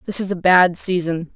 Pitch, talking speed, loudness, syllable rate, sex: 180 Hz, 220 wpm, -17 LUFS, 5.0 syllables/s, female